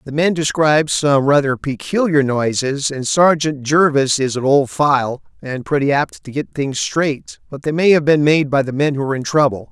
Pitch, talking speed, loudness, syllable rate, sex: 140 Hz, 210 wpm, -16 LUFS, 4.8 syllables/s, male